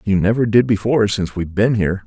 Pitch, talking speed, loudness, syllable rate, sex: 105 Hz, 230 wpm, -17 LUFS, 7.1 syllables/s, male